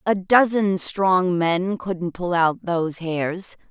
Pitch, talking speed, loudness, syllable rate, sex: 180 Hz, 145 wpm, -21 LUFS, 3.2 syllables/s, female